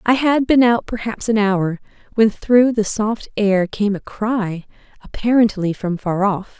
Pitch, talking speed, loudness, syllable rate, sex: 215 Hz, 175 wpm, -18 LUFS, 4.0 syllables/s, female